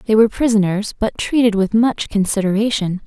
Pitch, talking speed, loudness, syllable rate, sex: 215 Hz, 155 wpm, -17 LUFS, 5.6 syllables/s, female